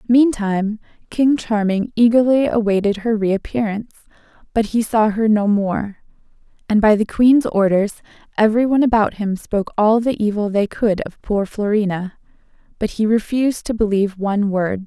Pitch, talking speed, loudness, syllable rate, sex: 215 Hz, 155 wpm, -18 LUFS, 5.2 syllables/s, female